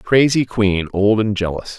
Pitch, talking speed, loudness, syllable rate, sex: 105 Hz, 200 wpm, -17 LUFS, 4.7 syllables/s, male